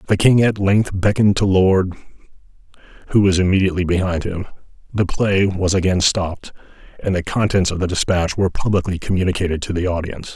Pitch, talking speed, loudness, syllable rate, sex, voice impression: 95 Hz, 170 wpm, -18 LUFS, 6.1 syllables/s, male, very masculine, very adult-like, middle-aged, very thick, slightly tensed, very powerful, slightly dark, hard, very muffled, fluent, very cool, intellectual, sincere, calm, very mature, friendly, reassuring, very wild, slightly sweet, strict, slightly modest